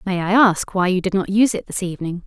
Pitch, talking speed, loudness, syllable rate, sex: 190 Hz, 290 wpm, -18 LUFS, 6.6 syllables/s, female